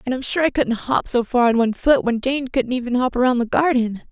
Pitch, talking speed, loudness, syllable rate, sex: 250 Hz, 275 wpm, -19 LUFS, 5.9 syllables/s, female